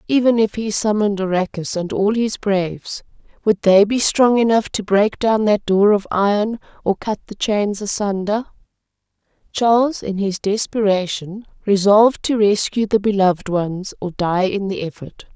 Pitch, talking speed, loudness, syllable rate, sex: 205 Hz, 160 wpm, -18 LUFS, 4.6 syllables/s, female